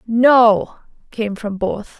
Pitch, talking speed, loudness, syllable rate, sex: 220 Hz, 120 wpm, -16 LUFS, 2.6 syllables/s, female